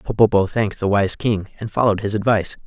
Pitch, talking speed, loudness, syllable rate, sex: 105 Hz, 200 wpm, -19 LUFS, 6.6 syllables/s, male